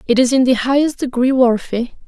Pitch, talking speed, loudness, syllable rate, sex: 255 Hz, 200 wpm, -15 LUFS, 5.6 syllables/s, female